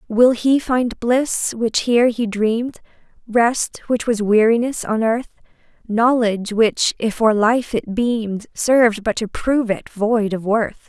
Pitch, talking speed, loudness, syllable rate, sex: 230 Hz, 160 wpm, -18 LUFS, 4.1 syllables/s, female